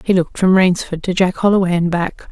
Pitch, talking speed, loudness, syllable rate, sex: 180 Hz, 235 wpm, -16 LUFS, 5.9 syllables/s, female